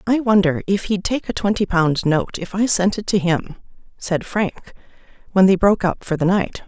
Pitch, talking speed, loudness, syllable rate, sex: 190 Hz, 215 wpm, -19 LUFS, 5.0 syllables/s, female